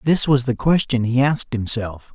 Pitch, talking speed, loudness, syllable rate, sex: 125 Hz, 195 wpm, -19 LUFS, 5.0 syllables/s, male